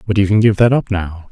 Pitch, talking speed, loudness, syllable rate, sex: 100 Hz, 320 wpm, -14 LUFS, 6.0 syllables/s, male